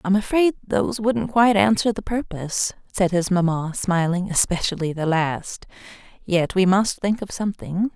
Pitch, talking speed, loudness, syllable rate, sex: 190 Hz, 150 wpm, -21 LUFS, 4.9 syllables/s, female